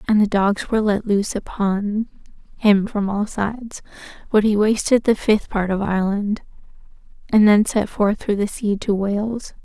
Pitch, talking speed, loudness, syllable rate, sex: 205 Hz, 175 wpm, -19 LUFS, 4.6 syllables/s, female